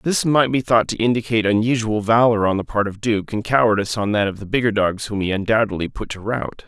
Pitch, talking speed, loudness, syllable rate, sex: 110 Hz, 245 wpm, -19 LUFS, 6.1 syllables/s, male